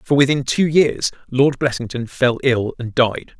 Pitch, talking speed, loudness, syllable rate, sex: 130 Hz, 175 wpm, -18 LUFS, 4.3 syllables/s, male